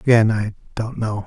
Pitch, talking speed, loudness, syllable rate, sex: 110 Hz, 190 wpm, -21 LUFS, 4.9 syllables/s, male